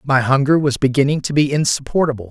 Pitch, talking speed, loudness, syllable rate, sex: 140 Hz, 180 wpm, -16 LUFS, 6.3 syllables/s, male